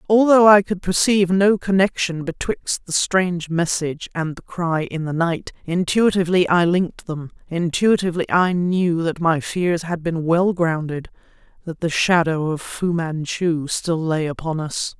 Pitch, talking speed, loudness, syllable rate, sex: 170 Hz, 160 wpm, -19 LUFS, 4.5 syllables/s, female